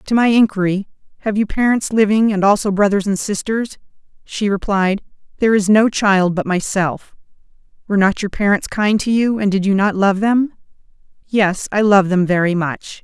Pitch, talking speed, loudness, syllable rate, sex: 200 Hz, 180 wpm, -16 LUFS, 5.0 syllables/s, female